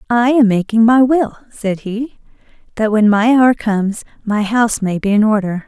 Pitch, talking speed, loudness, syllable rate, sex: 220 Hz, 190 wpm, -14 LUFS, 4.8 syllables/s, female